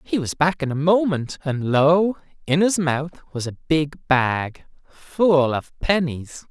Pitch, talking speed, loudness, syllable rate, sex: 155 Hz, 165 wpm, -21 LUFS, 3.5 syllables/s, male